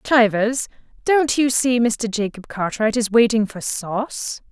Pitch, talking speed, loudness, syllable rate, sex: 230 Hz, 145 wpm, -19 LUFS, 4.0 syllables/s, female